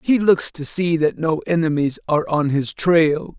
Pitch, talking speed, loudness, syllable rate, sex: 160 Hz, 195 wpm, -19 LUFS, 4.4 syllables/s, male